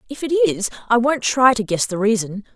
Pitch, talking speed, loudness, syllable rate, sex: 225 Hz, 235 wpm, -18 LUFS, 5.3 syllables/s, female